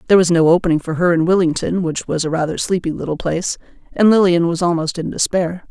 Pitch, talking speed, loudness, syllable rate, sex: 170 Hz, 220 wpm, -17 LUFS, 6.4 syllables/s, female